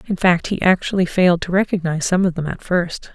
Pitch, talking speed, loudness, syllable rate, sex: 180 Hz, 230 wpm, -18 LUFS, 6.0 syllables/s, female